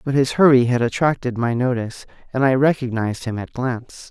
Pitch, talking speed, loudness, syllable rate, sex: 125 Hz, 190 wpm, -19 LUFS, 5.9 syllables/s, male